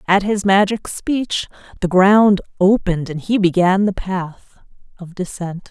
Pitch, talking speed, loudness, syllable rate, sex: 190 Hz, 145 wpm, -17 LUFS, 4.1 syllables/s, female